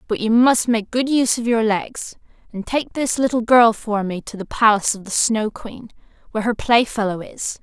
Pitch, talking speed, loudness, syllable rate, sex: 225 Hz, 210 wpm, -18 LUFS, 5.1 syllables/s, female